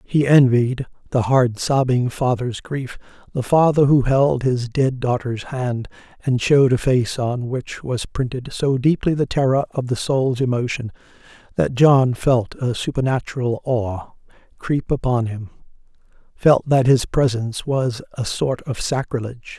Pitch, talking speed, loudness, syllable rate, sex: 125 Hz, 150 wpm, -19 LUFS, 4.3 syllables/s, male